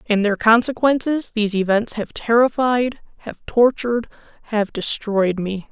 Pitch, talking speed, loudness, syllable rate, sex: 225 Hz, 105 wpm, -19 LUFS, 4.5 syllables/s, female